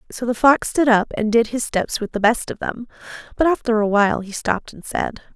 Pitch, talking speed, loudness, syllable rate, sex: 230 Hz, 245 wpm, -19 LUFS, 5.6 syllables/s, female